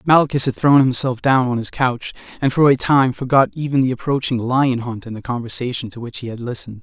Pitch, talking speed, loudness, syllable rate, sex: 125 Hz, 230 wpm, -18 LUFS, 5.8 syllables/s, male